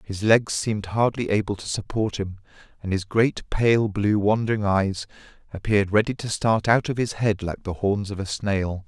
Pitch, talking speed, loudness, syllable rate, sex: 105 Hz, 195 wpm, -23 LUFS, 4.8 syllables/s, male